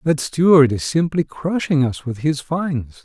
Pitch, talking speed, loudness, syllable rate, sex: 145 Hz, 180 wpm, -18 LUFS, 4.6 syllables/s, male